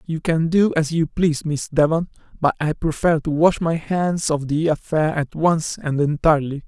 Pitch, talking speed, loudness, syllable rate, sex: 155 Hz, 200 wpm, -20 LUFS, 4.7 syllables/s, male